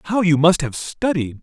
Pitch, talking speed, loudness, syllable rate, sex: 165 Hz, 210 wpm, -18 LUFS, 4.9 syllables/s, male